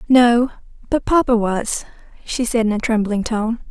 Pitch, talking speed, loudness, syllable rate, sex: 230 Hz, 160 wpm, -18 LUFS, 4.4 syllables/s, female